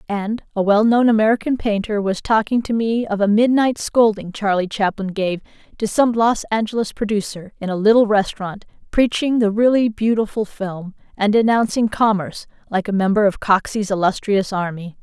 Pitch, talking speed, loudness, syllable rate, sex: 210 Hz, 160 wpm, -18 LUFS, 5.2 syllables/s, female